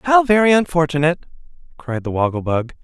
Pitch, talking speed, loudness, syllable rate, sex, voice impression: 160 Hz, 150 wpm, -17 LUFS, 6.1 syllables/s, male, masculine, adult-like, slightly middle-aged, very tensed, powerful, very bright, slightly soft, very clear, very fluent, cool, intellectual, very refreshing, sincere, slightly calm, very friendly, reassuring, very unique, slightly elegant, wild, slightly sweet, very lively, kind